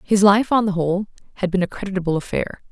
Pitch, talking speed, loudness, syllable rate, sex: 195 Hz, 220 wpm, -20 LUFS, 6.8 syllables/s, female